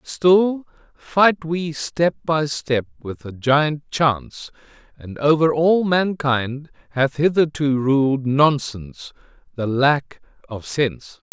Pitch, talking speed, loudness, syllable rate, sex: 145 Hz, 115 wpm, -19 LUFS, 3.3 syllables/s, male